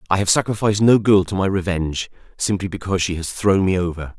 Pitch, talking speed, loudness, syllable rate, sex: 95 Hz, 215 wpm, -19 LUFS, 6.5 syllables/s, male